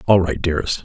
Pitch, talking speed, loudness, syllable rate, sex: 90 Hz, 215 wpm, -19 LUFS, 7.3 syllables/s, male